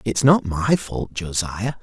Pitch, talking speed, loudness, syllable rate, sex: 105 Hz, 165 wpm, -21 LUFS, 3.5 syllables/s, male